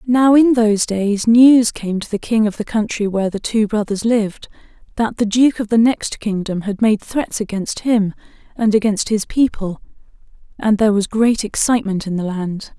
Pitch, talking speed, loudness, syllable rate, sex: 215 Hz, 190 wpm, -17 LUFS, 4.9 syllables/s, female